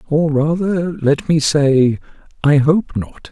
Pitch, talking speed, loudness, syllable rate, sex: 150 Hz, 145 wpm, -16 LUFS, 3.3 syllables/s, male